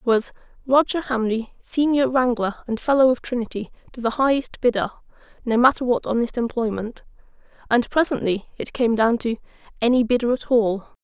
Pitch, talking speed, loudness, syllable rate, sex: 240 Hz, 160 wpm, -21 LUFS, 5.3 syllables/s, female